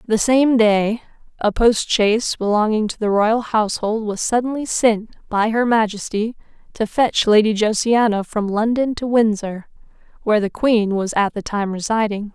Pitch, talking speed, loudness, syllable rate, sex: 220 Hz, 160 wpm, -18 LUFS, 4.6 syllables/s, female